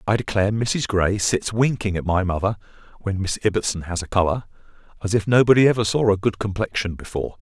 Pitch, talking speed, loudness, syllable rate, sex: 100 Hz, 195 wpm, -21 LUFS, 6.1 syllables/s, male